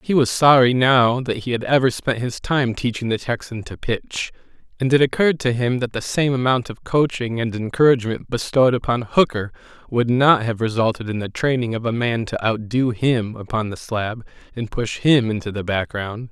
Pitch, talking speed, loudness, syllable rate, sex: 120 Hz, 200 wpm, -20 LUFS, 5.2 syllables/s, male